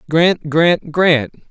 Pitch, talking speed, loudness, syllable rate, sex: 160 Hz, 120 wpm, -15 LUFS, 2.4 syllables/s, male